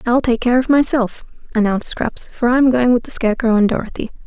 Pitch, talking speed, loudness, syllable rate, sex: 240 Hz, 210 wpm, -16 LUFS, 6.0 syllables/s, female